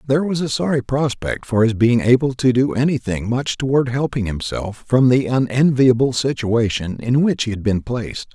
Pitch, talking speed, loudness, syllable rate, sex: 125 Hz, 185 wpm, -18 LUFS, 5.1 syllables/s, male